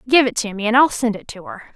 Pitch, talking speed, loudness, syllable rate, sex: 230 Hz, 340 wpm, -17 LUFS, 6.5 syllables/s, female